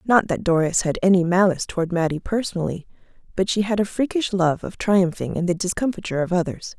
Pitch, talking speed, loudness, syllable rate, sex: 185 Hz, 195 wpm, -21 LUFS, 6.2 syllables/s, female